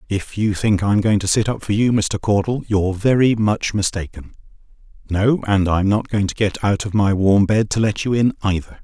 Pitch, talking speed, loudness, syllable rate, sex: 100 Hz, 225 wpm, -18 LUFS, 5.2 syllables/s, male